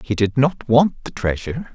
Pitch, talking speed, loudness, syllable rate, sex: 125 Hz, 205 wpm, -19 LUFS, 4.9 syllables/s, male